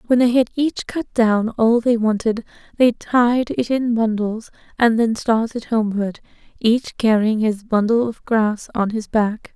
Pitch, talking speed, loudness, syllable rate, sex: 225 Hz, 170 wpm, -19 LUFS, 4.2 syllables/s, female